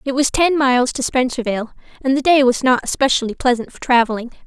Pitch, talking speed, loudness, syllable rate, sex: 255 Hz, 200 wpm, -17 LUFS, 6.4 syllables/s, female